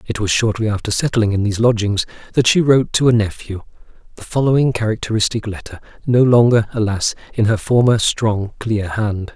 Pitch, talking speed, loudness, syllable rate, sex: 110 Hz, 175 wpm, -16 LUFS, 5.6 syllables/s, male